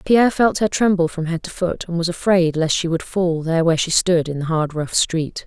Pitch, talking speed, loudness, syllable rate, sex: 170 Hz, 265 wpm, -19 LUFS, 5.5 syllables/s, female